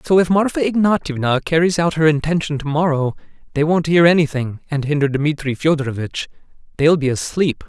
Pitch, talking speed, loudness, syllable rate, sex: 155 Hz, 165 wpm, -17 LUFS, 5.7 syllables/s, male